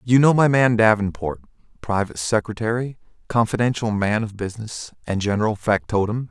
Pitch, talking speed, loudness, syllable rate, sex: 110 Hz, 125 wpm, -21 LUFS, 5.6 syllables/s, male